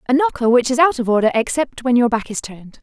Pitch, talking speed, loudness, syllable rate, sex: 245 Hz, 275 wpm, -17 LUFS, 6.5 syllables/s, female